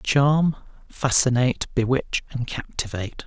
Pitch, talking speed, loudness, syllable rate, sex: 130 Hz, 90 wpm, -22 LUFS, 4.3 syllables/s, male